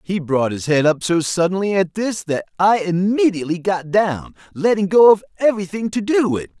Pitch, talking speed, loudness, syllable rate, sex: 185 Hz, 190 wpm, -18 LUFS, 5.2 syllables/s, male